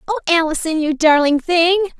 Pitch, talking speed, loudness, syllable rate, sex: 330 Hz, 150 wpm, -15 LUFS, 5.2 syllables/s, female